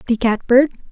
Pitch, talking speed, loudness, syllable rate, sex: 245 Hz, 195 wpm, -15 LUFS, 6.3 syllables/s, female